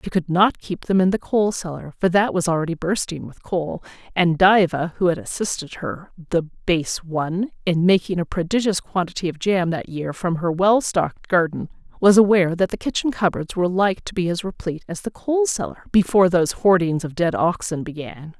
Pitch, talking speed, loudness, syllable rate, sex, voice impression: 180 Hz, 200 wpm, -20 LUFS, 5.5 syllables/s, female, feminine, middle-aged, tensed, powerful, hard, fluent, intellectual, slightly friendly, unique, lively, intense, slightly light